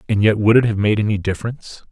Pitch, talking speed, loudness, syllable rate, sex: 105 Hz, 250 wpm, -17 LUFS, 7.1 syllables/s, male